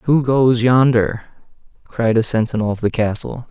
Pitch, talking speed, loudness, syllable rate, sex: 120 Hz, 155 wpm, -17 LUFS, 4.4 syllables/s, male